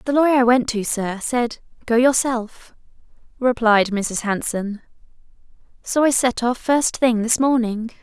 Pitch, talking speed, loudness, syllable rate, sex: 240 Hz, 140 wpm, -19 LUFS, 4.2 syllables/s, female